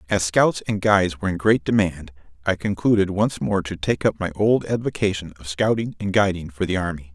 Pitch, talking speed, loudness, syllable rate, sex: 95 Hz, 210 wpm, -21 LUFS, 5.6 syllables/s, male